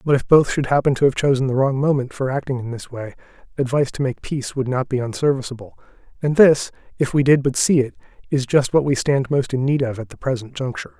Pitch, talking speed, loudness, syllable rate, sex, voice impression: 135 Hz, 245 wpm, -19 LUFS, 6.4 syllables/s, male, very masculine, very adult-like, slightly old, thick, slightly relaxed, slightly weak, slightly dark, soft, muffled, fluent, slightly raspy, cool, very intellectual, sincere, very calm, very mature, friendly, very reassuring, very unique, slightly elegant, wild, sweet, kind, modest